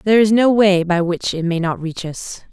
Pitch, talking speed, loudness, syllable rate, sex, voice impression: 190 Hz, 260 wpm, -17 LUFS, 5.2 syllables/s, female, feminine, adult-like, clear, fluent, intellectual, slightly elegant, lively, strict, sharp